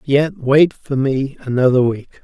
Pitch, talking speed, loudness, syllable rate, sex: 135 Hz, 160 wpm, -16 LUFS, 4.2 syllables/s, male